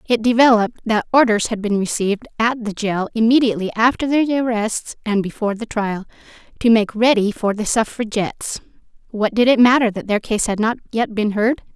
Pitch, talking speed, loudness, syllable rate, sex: 225 Hz, 185 wpm, -18 LUFS, 5.6 syllables/s, female